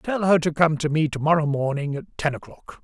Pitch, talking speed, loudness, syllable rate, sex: 155 Hz, 255 wpm, -22 LUFS, 5.7 syllables/s, male